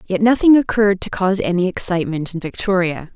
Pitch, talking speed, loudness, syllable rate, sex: 190 Hz, 170 wpm, -17 LUFS, 6.3 syllables/s, female